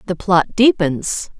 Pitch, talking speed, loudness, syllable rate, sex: 185 Hz, 130 wpm, -16 LUFS, 3.8 syllables/s, female